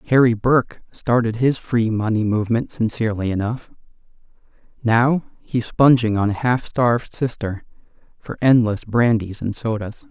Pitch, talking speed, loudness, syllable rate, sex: 115 Hz, 130 wpm, -19 LUFS, 4.7 syllables/s, male